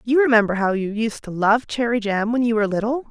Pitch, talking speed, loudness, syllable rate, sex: 225 Hz, 250 wpm, -20 LUFS, 6.1 syllables/s, female